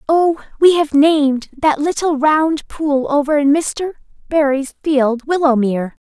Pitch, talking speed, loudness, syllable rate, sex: 295 Hz, 140 wpm, -16 LUFS, 4.1 syllables/s, female